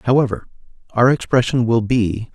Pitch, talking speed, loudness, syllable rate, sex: 120 Hz, 130 wpm, -17 LUFS, 5.1 syllables/s, male